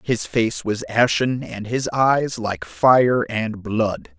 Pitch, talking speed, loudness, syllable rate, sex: 110 Hz, 160 wpm, -20 LUFS, 3.0 syllables/s, male